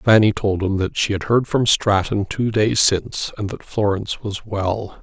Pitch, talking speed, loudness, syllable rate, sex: 105 Hz, 205 wpm, -19 LUFS, 4.5 syllables/s, male